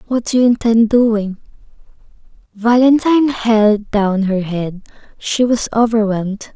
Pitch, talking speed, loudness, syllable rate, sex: 220 Hz, 120 wpm, -14 LUFS, 4.1 syllables/s, female